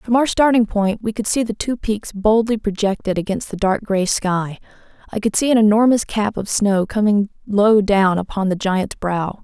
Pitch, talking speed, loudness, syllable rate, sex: 210 Hz, 205 wpm, -18 LUFS, 4.7 syllables/s, female